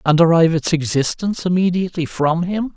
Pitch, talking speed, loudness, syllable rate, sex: 170 Hz, 150 wpm, -17 LUFS, 6.0 syllables/s, male